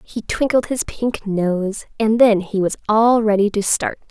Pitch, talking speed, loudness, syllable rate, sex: 215 Hz, 190 wpm, -18 LUFS, 4.1 syllables/s, female